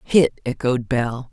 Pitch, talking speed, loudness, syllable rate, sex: 130 Hz, 135 wpm, -21 LUFS, 3.5 syllables/s, female